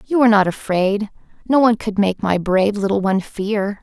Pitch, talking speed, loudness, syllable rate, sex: 205 Hz, 190 wpm, -18 LUFS, 5.6 syllables/s, female